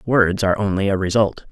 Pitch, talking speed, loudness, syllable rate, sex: 100 Hz, 200 wpm, -19 LUFS, 5.5 syllables/s, male